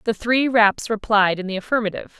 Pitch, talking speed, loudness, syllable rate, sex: 215 Hz, 190 wpm, -19 LUFS, 5.8 syllables/s, female